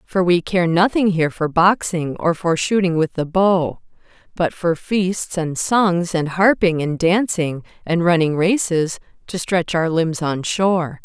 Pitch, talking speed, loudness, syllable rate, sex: 175 Hz, 170 wpm, -18 LUFS, 4.1 syllables/s, female